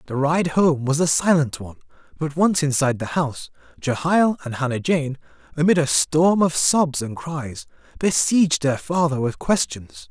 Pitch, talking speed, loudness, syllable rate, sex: 150 Hz, 165 wpm, -20 LUFS, 4.8 syllables/s, male